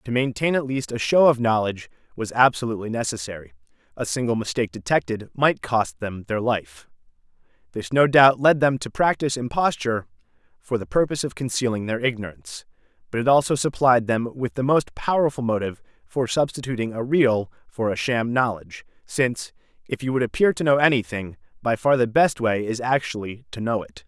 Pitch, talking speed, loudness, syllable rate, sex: 120 Hz, 175 wpm, -22 LUFS, 5.7 syllables/s, male